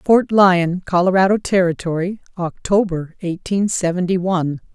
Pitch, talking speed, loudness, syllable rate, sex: 180 Hz, 100 wpm, -18 LUFS, 4.7 syllables/s, female